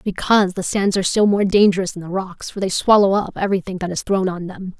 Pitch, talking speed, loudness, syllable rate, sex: 190 Hz, 250 wpm, -18 LUFS, 6.2 syllables/s, female